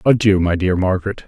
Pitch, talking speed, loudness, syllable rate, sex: 95 Hz, 190 wpm, -17 LUFS, 6.1 syllables/s, male